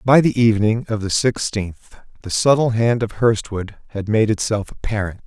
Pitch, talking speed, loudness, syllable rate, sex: 110 Hz, 170 wpm, -19 LUFS, 4.9 syllables/s, male